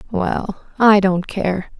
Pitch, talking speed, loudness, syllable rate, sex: 195 Hz, 135 wpm, -17 LUFS, 3.0 syllables/s, female